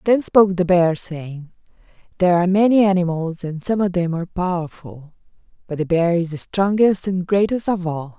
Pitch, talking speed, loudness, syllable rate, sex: 180 Hz, 185 wpm, -19 LUFS, 5.3 syllables/s, female